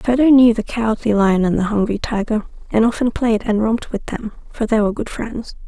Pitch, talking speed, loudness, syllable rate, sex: 220 Hz, 220 wpm, -18 LUFS, 5.7 syllables/s, female